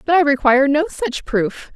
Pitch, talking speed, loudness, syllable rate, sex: 290 Hz, 205 wpm, -17 LUFS, 4.9 syllables/s, female